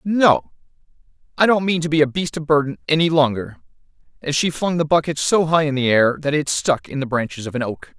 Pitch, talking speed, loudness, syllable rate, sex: 155 Hz, 235 wpm, -19 LUFS, 5.7 syllables/s, male